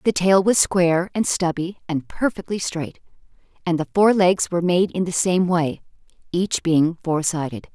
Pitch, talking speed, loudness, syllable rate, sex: 175 Hz, 180 wpm, -20 LUFS, 4.6 syllables/s, female